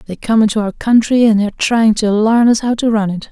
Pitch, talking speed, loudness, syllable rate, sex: 220 Hz, 270 wpm, -13 LUFS, 5.2 syllables/s, female